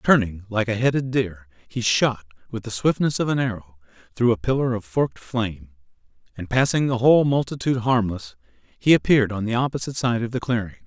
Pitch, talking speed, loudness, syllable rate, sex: 115 Hz, 190 wpm, -22 LUFS, 5.9 syllables/s, male